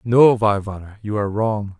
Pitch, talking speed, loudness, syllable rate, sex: 105 Hz, 165 wpm, -18 LUFS, 4.8 syllables/s, male